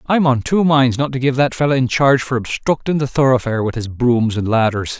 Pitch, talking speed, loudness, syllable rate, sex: 130 Hz, 240 wpm, -16 LUFS, 5.8 syllables/s, male